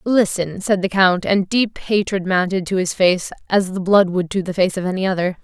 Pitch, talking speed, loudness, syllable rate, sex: 190 Hz, 230 wpm, -18 LUFS, 5.2 syllables/s, female